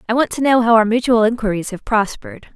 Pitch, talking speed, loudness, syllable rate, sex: 230 Hz, 235 wpm, -16 LUFS, 6.3 syllables/s, female